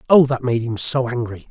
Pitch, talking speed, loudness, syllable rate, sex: 125 Hz, 240 wpm, -19 LUFS, 5.4 syllables/s, male